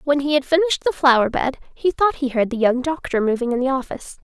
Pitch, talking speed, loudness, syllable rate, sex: 275 Hz, 250 wpm, -19 LUFS, 6.4 syllables/s, female